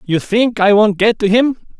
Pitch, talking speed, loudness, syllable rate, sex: 215 Hz, 235 wpm, -13 LUFS, 4.7 syllables/s, male